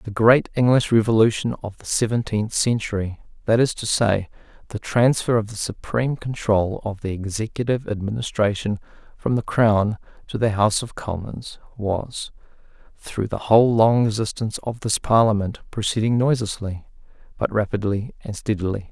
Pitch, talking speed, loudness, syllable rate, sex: 110 Hz, 145 wpm, -21 LUFS, 5.2 syllables/s, male